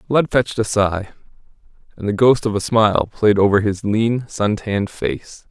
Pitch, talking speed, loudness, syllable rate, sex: 105 Hz, 185 wpm, -18 LUFS, 4.7 syllables/s, male